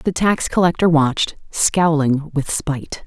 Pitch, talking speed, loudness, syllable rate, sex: 155 Hz, 135 wpm, -18 LUFS, 4.2 syllables/s, female